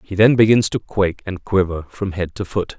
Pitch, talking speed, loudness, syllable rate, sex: 95 Hz, 235 wpm, -18 LUFS, 5.3 syllables/s, male